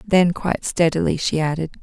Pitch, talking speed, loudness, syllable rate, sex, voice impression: 165 Hz, 165 wpm, -20 LUFS, 5.5 syllables/s, female, very feminine, middle-aged, slightly thin, very relaxed, weak, bright, very soft, very clear, fluent, slightly raspy, cute, slightly cool, very intellectual, slightly refreshing, very sincere, very calm, very friendly, very reassuring, very unique, very elegant, very wild, sweet, lively, very kind, modest, slightly light